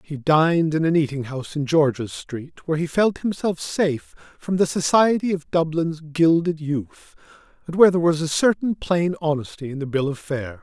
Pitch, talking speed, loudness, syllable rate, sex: 160 Hz, 190 wpm, -21 LUFS, 5.3 syllables/s, male